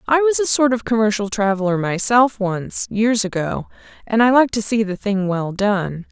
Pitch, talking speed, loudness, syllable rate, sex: 215 Hz, 175 wpm, -18 LUFS, 4.8 syllables/s, female